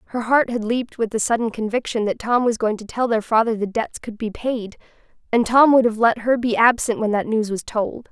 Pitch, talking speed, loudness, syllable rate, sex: 225 Hz, 250 wpm, -20 LUFS, 5.5 syllables/s, female